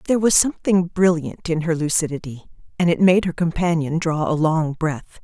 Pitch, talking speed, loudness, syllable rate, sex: 165 Hz, 185 wpm, -20 LUFS, 5.3 syllables/s, female